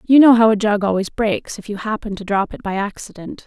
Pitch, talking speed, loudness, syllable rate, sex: 210 Hz, 260 wpm, -17 LUFS, 5.6 syllables/s, female